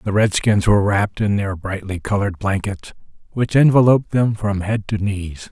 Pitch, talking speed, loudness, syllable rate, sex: 100 Hz, 175 wpm, -18 LUFS, 5.2 syllables/s, male